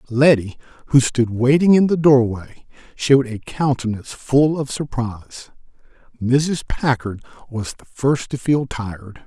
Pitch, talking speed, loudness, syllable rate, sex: 130 Hz, 135 wpm, -18 LUFS, 4.4 syllables/s, male